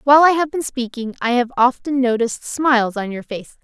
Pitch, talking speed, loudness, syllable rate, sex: 250 Hz, 215 wpm, -18 LUFS, 5.9 syllables/s, female